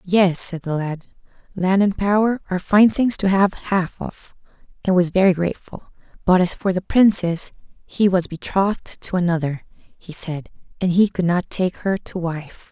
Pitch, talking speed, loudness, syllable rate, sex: 185 Hz, 180 wpm, -19 LUFS, 4.6 syllables/s, female